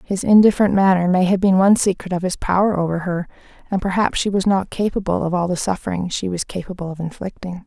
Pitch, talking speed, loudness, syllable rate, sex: 185 Hz, 220 wpm, -19 LUFS, 6.3 syllables/s, female